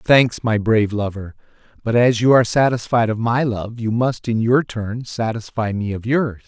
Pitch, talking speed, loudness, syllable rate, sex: 115 Hz, 195 wpm, -19 LUFS, 4.8 syllables/s, male